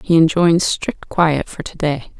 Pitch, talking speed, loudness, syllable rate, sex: 165 Hz, 190 wpm, -17 LUFS, 3.9 syllables/s, female